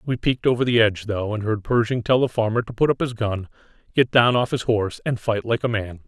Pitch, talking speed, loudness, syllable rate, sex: 115 Hz, 265 wpm, -21 LUFS, 6.0 syllables/s, male